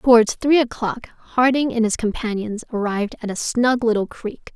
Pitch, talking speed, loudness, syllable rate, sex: 230 Hz, 170 wpm, -20 LUFS, 4.9 syllables/s, female